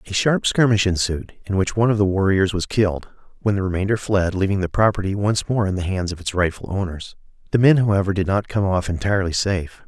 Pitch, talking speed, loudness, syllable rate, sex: 95 Hz, 225 wpm, -20 LUFS, 6.1 syllables/s, male